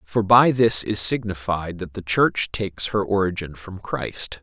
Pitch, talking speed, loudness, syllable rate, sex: 95 Hz, 175 wpm, -21 LUFS, 4.2 syllables/s, male